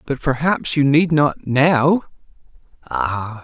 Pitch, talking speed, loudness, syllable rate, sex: 140 Hz, 105 wpm, -17 LUFS, 3.5 syllables/s, male